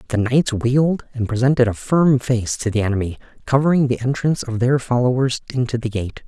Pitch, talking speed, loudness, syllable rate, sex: 125 Hz, 190 wpm, -19 LUFS, 5.8 syllables/s, male